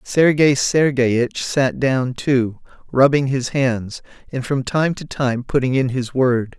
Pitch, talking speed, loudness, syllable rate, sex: 130 Hz, 155 wpm, -18 LUFS, 3.5 syllables/s, male